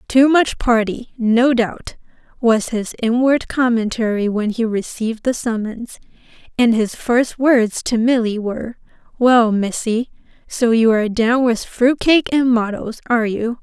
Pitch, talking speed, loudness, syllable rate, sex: 235 Hz, 150 wpm, -17 LUFS, 4.2 syllables/s, female